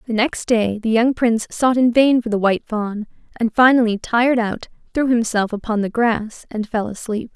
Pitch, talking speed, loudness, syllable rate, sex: 225 Hz, 205 wpm, -18 LUFS, 5.1 syllables/s, female